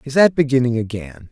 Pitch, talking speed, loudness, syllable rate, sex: 130 Hz, 185 wpm, -17 LUFS, 5.8 syllables/s, male